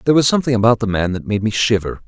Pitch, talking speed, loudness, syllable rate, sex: 115 Hz, 290 wpm, -17 LUFS, 7.9 syllables/s, male